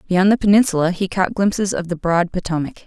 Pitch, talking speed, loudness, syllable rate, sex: 185 Hz, 210 wpm, -18 LUFS, 6.3 syllables/s, female